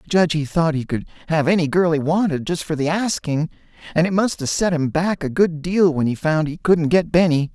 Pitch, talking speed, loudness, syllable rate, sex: 165 Hz, 255 wpm, -19 LUFS, 5.5 syllables/s, male